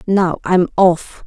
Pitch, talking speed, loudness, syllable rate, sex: 180 Hz, 190 wpm, -15 LUFS, 4.0 syllables/s, female